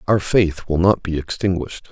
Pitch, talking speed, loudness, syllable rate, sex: 90 Hz, 190 wpm, -19 LUFS, 5.1 syllables/s, male